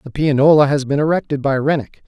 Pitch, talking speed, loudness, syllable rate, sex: 145 Hz, 205 wpm, -16 LUFS, 6.1 syllables/s, male